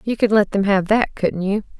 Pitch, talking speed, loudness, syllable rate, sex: 205 Hz, 270 wpm, -18 LUFS, 5.1 syllables/s, female